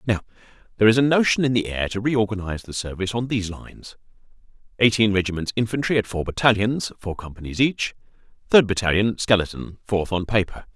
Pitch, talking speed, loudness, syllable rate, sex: 105 Hz, 160 wpm, -22 LUFS, 6.3 syllables/s, male